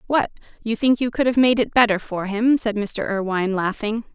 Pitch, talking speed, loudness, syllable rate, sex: 220 Hz, 215 wpm, -20 LUFS, 5.3 syllables/s, female